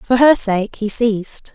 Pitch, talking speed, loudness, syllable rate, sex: 225 Hz, 195 wpm, -16 LUFS, 4.0 syllables/s, female